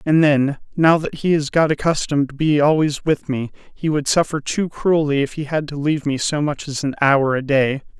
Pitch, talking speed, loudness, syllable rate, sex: 145 Hz, 235 wpm, -19 LUFS, 5.2 syllables/s, male